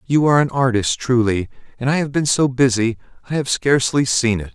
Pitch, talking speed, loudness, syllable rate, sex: 125 Hz, 210 wpm, -18 LUFS, 5.7 syllables/s, male